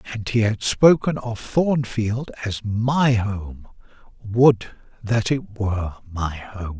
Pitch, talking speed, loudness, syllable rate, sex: 110 Hz, 125 wpm, -21 LUFS, 3.3 syllables/s, male